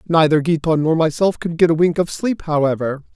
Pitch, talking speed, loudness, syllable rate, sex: 160 Hz, 210 wpm, -17 LUFS, 5.6 syllables/s, male